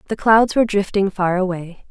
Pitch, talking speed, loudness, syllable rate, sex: 195 Hz, 190 wpm, -17 LUFS, 5.3 syllables/s, female